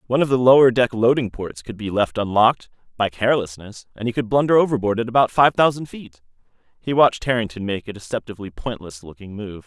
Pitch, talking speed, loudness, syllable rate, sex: 115 Hz, 200 wpm, -19 LUFS, 6.3 syllables/s, male